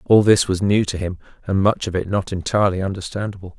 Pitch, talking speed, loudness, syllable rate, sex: 95 Hz, 215 wpm, -20 LUFS, 6.3 syllables/s, male